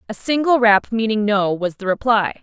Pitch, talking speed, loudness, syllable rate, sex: 215 Hz, 200 wpm, -18 LUFS, 5.0 syllables/s, female